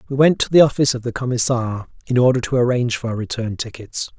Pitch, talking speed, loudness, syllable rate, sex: 125 Hz, 230 wpm, -19 LUFS, 6.7 syllables/s, male